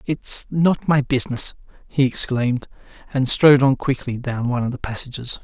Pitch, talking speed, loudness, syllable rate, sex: 130 Hz, 165 wpm, -19 LUFS, 5.3 syllables/s, male